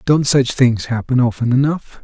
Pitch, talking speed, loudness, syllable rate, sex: 130 Hz, 175 wpm, -16 LUFS, 4.7 syllables/s, male